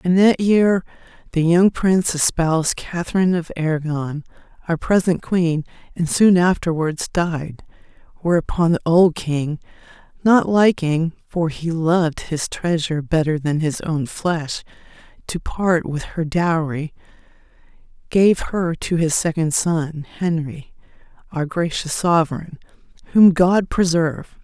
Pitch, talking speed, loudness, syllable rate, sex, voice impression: 165 Hz, 120 wpm, -19 LUFS, 4.1 syllables/s, female, slightly feminine, very gender-neutral, very adult-like, slightly middle-aged, tensed, very powerful, slightly dark, soft, slightly muffled, fluent, slightly raspy, very cool, very intellectual, sincere, calm, friendly, reassuring, elegant, slightly sweet, kind, modest